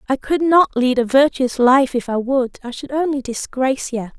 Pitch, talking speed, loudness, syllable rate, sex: 260 Hz, 215 wpm, -17 LUFS, 4.9 syllables/s, female